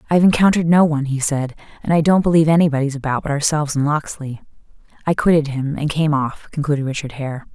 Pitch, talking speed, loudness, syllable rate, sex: 150 Hz, 205 wpm, -18 LUFS, 6.8 syllables/s, female